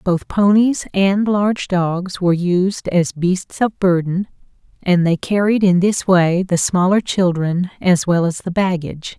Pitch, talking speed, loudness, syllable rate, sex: 185 Hz, 165 wpm, -17 LUFS, 4.1 syllables/s, female